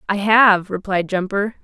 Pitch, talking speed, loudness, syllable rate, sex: 200 Hz, 145 wpm, -17 LUFS, 4.2 syllables/s, female